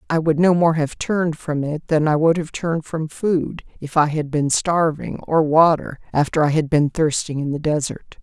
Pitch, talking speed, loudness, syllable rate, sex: 155 Hz, 220 wpm, -19 LUFS, 4.8 syllables/s, female